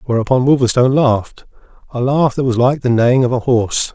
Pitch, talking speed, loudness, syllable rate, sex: 125 Hz, 200 wpm, -14 LUFS, 6.2 syllables/s, male